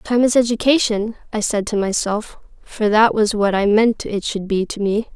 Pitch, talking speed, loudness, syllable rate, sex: 215 Hz, 210 wpm, -18 LUFS, 4.7 syllables/s, female